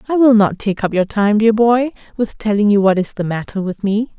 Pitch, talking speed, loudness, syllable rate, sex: 215 Hz, 260 wpm, -15 LUFS, 5.3 syllables/s, female